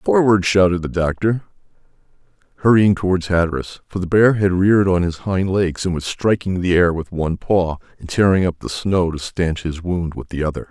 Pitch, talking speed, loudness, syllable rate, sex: 90 Hz, 200 wpm, -18 LUFS, 5.2 syllables/s, male